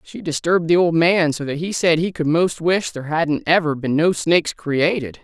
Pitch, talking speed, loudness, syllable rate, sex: 160 Hz, 230 wpm, -18 LUFS, 5.1 syllables/s, male